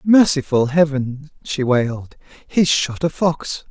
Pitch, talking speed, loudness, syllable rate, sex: 145 Hz, 130 wpm, -18 LUFS, 3.7 syllables/s, male